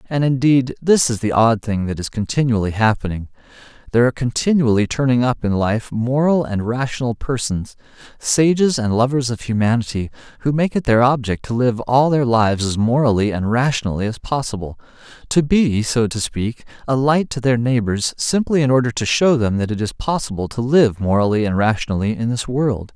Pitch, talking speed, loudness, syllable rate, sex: 120 Hz, 185 wpm, -18 LUFS, 5.4 syllables/s, male